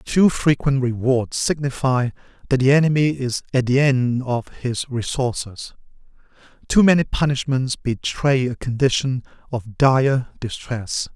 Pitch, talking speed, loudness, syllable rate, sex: 130 Hz, 125 wpm, -20 LUFS, 4.1 syllables/s, male